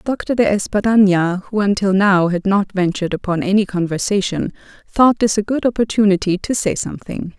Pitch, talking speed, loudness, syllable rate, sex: 200 Hz, 165 wpm, -17 LUFS, 5.6 syllables/s, female